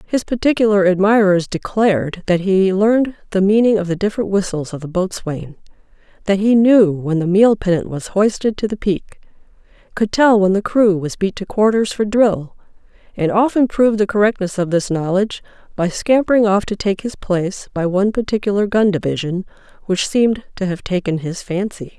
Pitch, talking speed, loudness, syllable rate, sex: 200 Hz, 180 wpm, -17 LUFS, 5.3 syllables/s, female